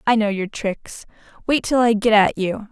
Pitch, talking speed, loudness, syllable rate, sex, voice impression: 215 Hz, 220 wpm, -19 LUFS, 4.6 syllables/s, female, feminine, adult-like, tensed, powerful, bright, clear, slightly raspy, intellectual, friendly, reassuring, elegant, lively, slightly kind